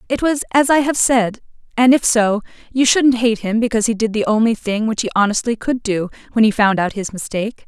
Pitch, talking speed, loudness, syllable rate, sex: 225 Hz, 235 wpm, -16 LUFS, 5.8 syllables/s, female